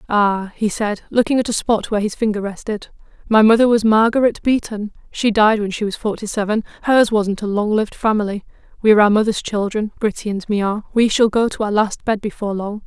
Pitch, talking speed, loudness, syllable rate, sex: 215 Hz, 205 wpm, -18 LUFS, 5.9 syllables/s, female